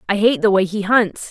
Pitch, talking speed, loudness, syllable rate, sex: 205 Hz, 275 wpm, -16 LUFS, 5.3 syllables/s, female